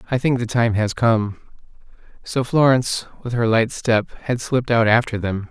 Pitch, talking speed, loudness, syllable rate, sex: 115 Hz, 185 wpm, -19 LUFS, 4.8 syllables/s, male